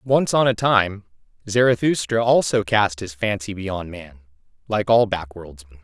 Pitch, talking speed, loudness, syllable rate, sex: 105 Hz, 145 wpm, -20 LUFS, 4.4 syllables/s, male